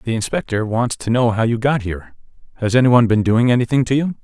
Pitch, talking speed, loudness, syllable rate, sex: 115 Hz, 225 wpm, -17 LUFS, 6.4 syllables/s, male